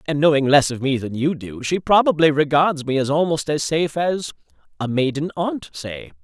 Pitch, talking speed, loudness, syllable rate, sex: 150 Hz, 190 wpm, -20 LUFS, 5.1 syllables/s, male